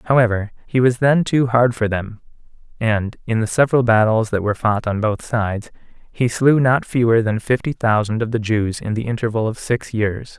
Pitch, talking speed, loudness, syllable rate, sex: 115 Hz, 200 wpm, -18 LUFS, 5.1 syllables/s, male